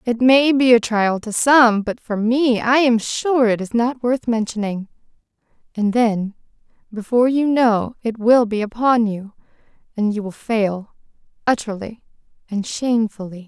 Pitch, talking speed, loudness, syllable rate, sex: 230 Hz, 155 wpm, -18 LUFS, 4.3 syllables/s, female